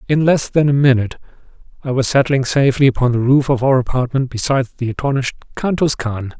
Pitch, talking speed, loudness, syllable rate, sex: 130 Hz, 190 wpm, -16 LUFS, 6.4 syllables/s, male